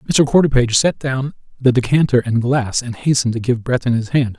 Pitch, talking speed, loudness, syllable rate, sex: 125 Hz, 190 wpm, -16 LUFS, 5.4 syllables/s, male